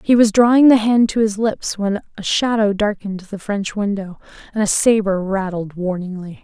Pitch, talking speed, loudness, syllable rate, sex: 205 Hz, 185 wpm, -17 LUFS, 5.0 syllables/s, female